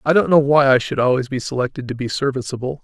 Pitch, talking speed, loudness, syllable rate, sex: 135 Hz, 255 wpm, -18 LUFS, 6.6 syllables/s, male